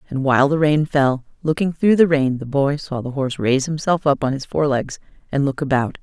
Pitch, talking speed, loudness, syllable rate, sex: 140 Hz, 230 wpm, -19 LUFS, 5.8 syllables/s, female